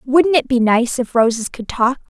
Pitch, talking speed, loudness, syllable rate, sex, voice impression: 255 Hz, 220 wpm, -16 LUFS, 4.6 syllables/s, female, feminine, slightly young, tensed, powerful, bright, clear, slightly cute, friendly, lively, intense